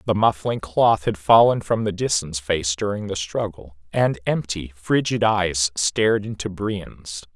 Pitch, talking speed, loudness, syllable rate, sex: 100 Hz, 155 wpm, -21 LUFS, 4.1 syllables/s, male